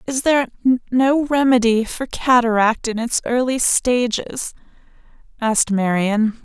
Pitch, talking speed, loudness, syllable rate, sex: 240 Hz, 110 wpm, -18 LUFS, 4.1 syllables/s, female